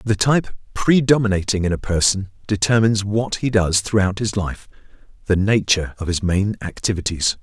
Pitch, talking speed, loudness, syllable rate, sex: 100 Hz, 145 wpm, -19 LUFS, 5.4 syllables/s, male